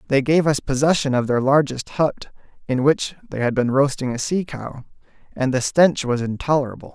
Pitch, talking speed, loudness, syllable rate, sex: 135 Hz, 190 wpm, -20 LUFS, 5.2 syllables/s, male